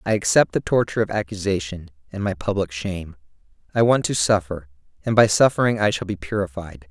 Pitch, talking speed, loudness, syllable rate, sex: 95 Hz, 180 wpm, -21 LUFS, 6.0 syllables/s, male